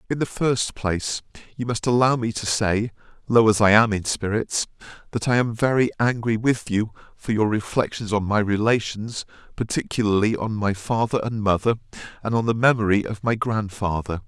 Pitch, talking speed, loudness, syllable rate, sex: 110 Hz, 175 wpm, -22 LUFS, 5.2 syllables/s, male